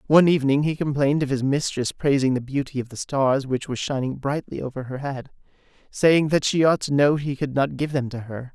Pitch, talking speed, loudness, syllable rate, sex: 140 Hz, 230 wpm, -22 LUFS, 5.8 syllables/s, male